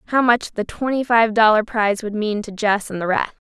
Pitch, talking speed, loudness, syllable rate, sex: 220 Hz, 240 wpm, -19 LUFS, 5.4 syllables/s, female